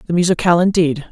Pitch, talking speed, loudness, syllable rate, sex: 170 Hz, 160 wpm, -15 LUFS, 7.4 syllables/s, female